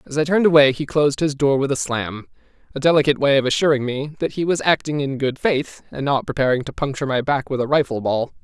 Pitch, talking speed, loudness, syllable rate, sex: 140 Hz, 240 wpm, -19 LUFS, 6.5 syllables/s, male